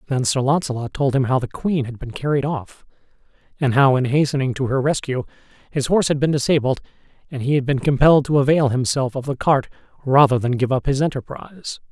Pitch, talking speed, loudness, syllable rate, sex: 135 Hz, 205 wpm, -19 LUFS, 6.0 syllables/s, male